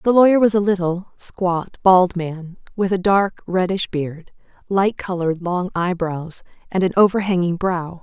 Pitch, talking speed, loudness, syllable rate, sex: 185 Hz, 155 wpm, -19 LUFS, 4.3 syllables/s, female